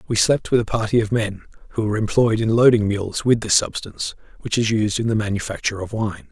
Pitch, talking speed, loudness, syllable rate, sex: 110 Hz, 230 wpm, -20 LUFS, 6.1 syllables/s, male